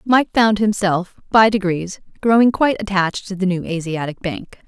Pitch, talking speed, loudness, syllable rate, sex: 195 Hz, 165 wpm, -18 LUFS, 5.1 syllables/s, female